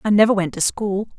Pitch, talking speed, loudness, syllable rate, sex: 200 Hz, 255 wpm, -19 LUFS, 5.9 syllables/s, female